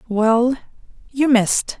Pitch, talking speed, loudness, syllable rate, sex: 240 Hz, 100 wpm, -17 LUFS, 3.6 syllables/s, female